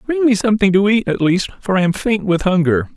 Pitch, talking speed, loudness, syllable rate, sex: 195 Hz, 265 wpm, -16 LUFS, 5.9 syllables/s, male